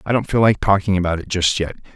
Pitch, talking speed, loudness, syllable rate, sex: 95 Hz, 275 wpm, -18 LUFS, 6.7 syllables/s, male